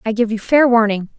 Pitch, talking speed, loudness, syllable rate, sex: 225 Hz, 255 wpm, -15 LUFS, 5.9 syllables/s, female